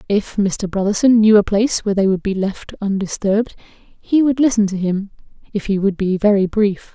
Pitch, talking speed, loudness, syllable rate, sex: 205 Hz, 200 wpm, -17 LUFS, 5.2 syllables/s, female